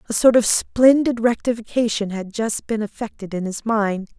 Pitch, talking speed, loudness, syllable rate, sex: 220 Hz, 170 wpm, -20 LUFS, 4.8 syllables/s, female